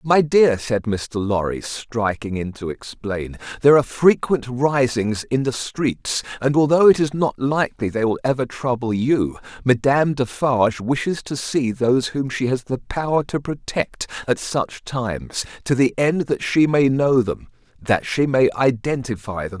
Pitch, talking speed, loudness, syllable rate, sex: 125 Hz, 170 wpm, -20 LUFS, 4.4 syllables/s, male